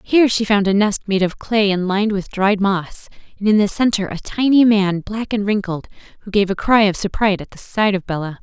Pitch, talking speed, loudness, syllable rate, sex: 205 Hz, 240 wpm, -17 LUFS, 5.6 syllables/s, female